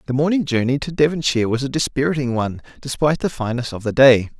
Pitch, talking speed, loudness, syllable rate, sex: 135 Hz, 205 wpm, -19 LUFS, 7.0 syllables/s, male